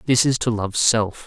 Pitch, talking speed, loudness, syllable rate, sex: 115 Hz, 240 wpm, -19 LUFS, 4.5 syllables/s, male